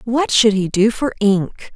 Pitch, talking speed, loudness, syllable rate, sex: 220 Hz, 205 wpm, -16 LUFS, 3.9 syllables/s, female